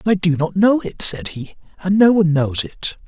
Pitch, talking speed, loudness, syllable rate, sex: 180 Hz, 255 wpm, -17 LUFS, 5.2 syllables/s, male